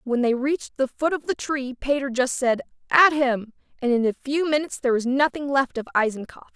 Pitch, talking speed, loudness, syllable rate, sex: 265 Hz, 220 wpm, -23 LUFS, 5.7 syllables/s, female